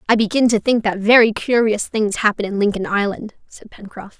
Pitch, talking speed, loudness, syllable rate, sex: 215 Hz, 200 wpm, -17 LUFS, 5.4 syllables/s, female